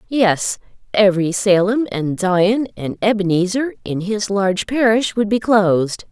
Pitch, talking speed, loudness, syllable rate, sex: 205 Hz, 135 wpm, -17 LUFS, 4.3 syllables/s, female